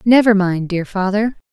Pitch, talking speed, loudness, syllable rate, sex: 200 Hz, 160 wpm, -16 LUFS, 4.6 syllables/s, female